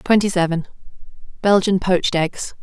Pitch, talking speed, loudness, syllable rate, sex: 185 Hz, 90 wpm, -18 LUFS, 5.1 syllables/s, female